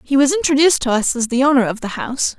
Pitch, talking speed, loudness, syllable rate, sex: 265 Hz, 275 wpm, -16 LUFS, 7.5 syllables/s, female